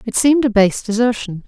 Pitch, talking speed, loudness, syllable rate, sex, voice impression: 230 Hz, 205 wpm, -16 LUFS, 5.9 syllables/s, female, feminine, adult-like, calm, slightly elegant, slightly sweet